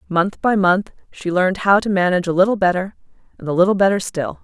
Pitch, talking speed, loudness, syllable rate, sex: 185 Hz, 215 wpm, -17 LUFS, 6.3 syllables/s, female